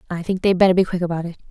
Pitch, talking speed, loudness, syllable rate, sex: 180 Hz, 320 wpm, -19 LUFS, 8.3 syllables/s, female